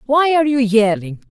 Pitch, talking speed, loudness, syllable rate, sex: 245 Hz, 185 wpm, -15 LUFS, 5.3 syllables/s, female